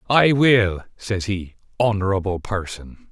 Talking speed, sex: 115 wpm, male